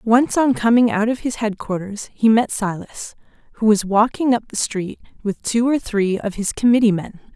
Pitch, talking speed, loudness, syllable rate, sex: 220 Hz, 195 wpm, -19 LUFS, 4.9 syllables/s, female